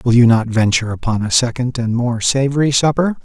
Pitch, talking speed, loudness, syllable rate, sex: 120 Hz, 205 wpm, -15 LUFS, 5.8 syllables/s, male